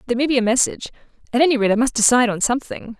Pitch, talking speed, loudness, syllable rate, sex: 240 Hz, 240 wpm, -18 LUFS, 8.9 syllables/s, female